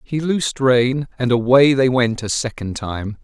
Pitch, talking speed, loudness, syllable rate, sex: 125 Hz, 185 wpm, -17 LUFS, 4.6 syllables/s, male